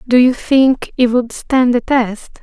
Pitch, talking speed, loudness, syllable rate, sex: 250 Hz, 200 wpm, -14 LUFS, 3.6 syllables/s, female